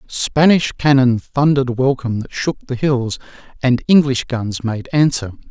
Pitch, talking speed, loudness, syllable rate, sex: 130 Hz, 155 wpm, -16 LUFS, 4.6 syllables/s, male